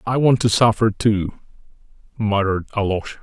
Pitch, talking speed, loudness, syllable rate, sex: 105 Hz, 130 wpm, -19 LUFS, 5.7 syllables/s, male